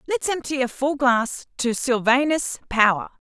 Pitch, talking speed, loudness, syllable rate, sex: 260 Hz, 145 wpm, -21 LUFS, 4.3 syllables/s, female